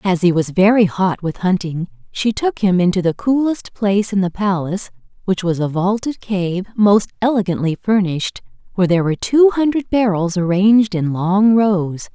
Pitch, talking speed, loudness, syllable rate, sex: 195 Hz, 175 wpm, -17 LUFS, 5.1 syllables/s, female